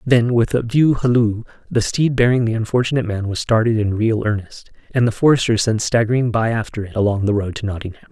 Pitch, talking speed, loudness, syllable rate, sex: 115 Hz, 215 wpm, -18 LUFS, 6.0 syllables/s, male